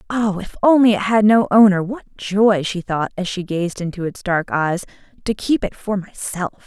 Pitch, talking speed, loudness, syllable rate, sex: 195 Hz, 205 wpm, -18 LUFS, 4.7 syllables/s, female